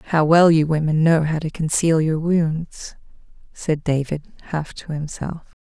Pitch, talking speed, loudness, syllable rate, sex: 160 Hz, 160 wpm, -20 LUFS, 4.2 syllables/s, female